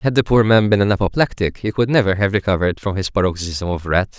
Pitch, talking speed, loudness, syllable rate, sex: 100 Hz, 245 wpm, -17 LUFS, 6.5 syllables/s, male